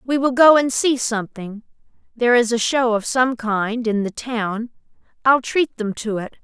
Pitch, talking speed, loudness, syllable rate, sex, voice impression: 235 Hz, 185 wpm, -19 LUFS, 4.6 syllables/s, female, very feminine, very young, very thin, very tensed, powerful, very bright, hard, very clear, very fluent, very cute, slightly intellectual, very refreshing, slightly sincere, slightly calm, very friendly, very unique, very wild, sweet, lively, slightly kind, slightly strict, intense, slightly sharp, slightly modest